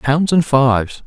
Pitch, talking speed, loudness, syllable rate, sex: 140 Hz, 170 wpm, -15 LUFS, 3.9 syllables/s, male